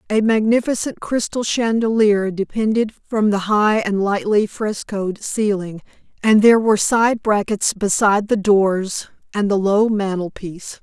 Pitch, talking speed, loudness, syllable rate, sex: 210 Hz, 140 wpm, -18 LUFS, 4.4 syllables/s, female